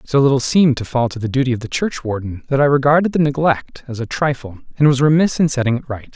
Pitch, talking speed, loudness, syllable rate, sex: 135 Hz, 255 wpm, -17 LUFS, 6.4 syllables/s, male